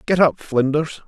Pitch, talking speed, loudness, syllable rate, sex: 145 Hz, 170 wpm, -19 LUFS, 4.4 syllables/s, male